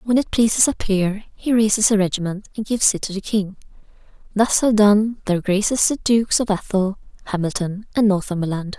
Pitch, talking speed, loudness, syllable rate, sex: 205 Hz, 185 wpm, -19 LUFS, 5.5 syllables/s, female